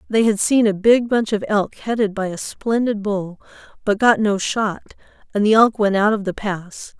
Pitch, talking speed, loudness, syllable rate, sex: 210 Hz, 215 wpm, -18 LUFS, 4.7 syllables/s, female